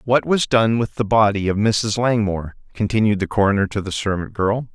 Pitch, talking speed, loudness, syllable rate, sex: 105 Hz, 200 wpm, -19 LUFS, 5.4 syllables/s, male